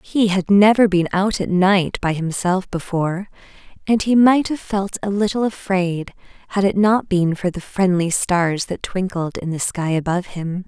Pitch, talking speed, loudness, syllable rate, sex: 190 Hz, 185 wpm, -19 LUFS, 4.5 syllables/s, female